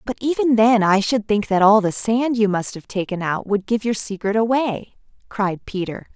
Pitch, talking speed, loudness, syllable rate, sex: 215 Hz, 215 wpm, -19 LUFS, 4.7 syllables/s, female